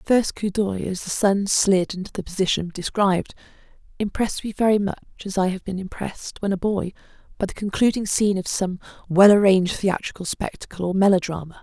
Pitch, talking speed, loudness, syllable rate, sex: 195 Hz, 185 wpm, -22 LUFS, 5.8 syllables/s, female